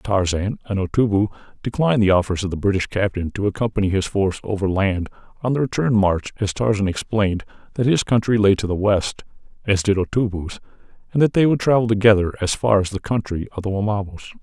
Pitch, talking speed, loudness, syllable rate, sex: 105 Hz, 190 wpm, -20 LUFS, 6.1 syllables/s, male